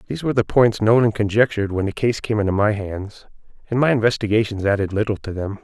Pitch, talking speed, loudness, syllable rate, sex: 105 Hz, 225 wpm, -19 LUFS, 6.6 syllables/s, male